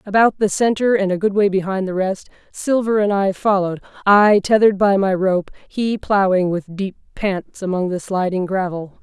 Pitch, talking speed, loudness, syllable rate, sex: 195 Hz, 180 wpm, -18 LUFS, 5.0 syllables/s, female